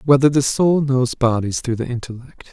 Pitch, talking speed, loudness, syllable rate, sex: 130 Hz, 190 wpm, -18 LUFS, 5.1 syllables/s, male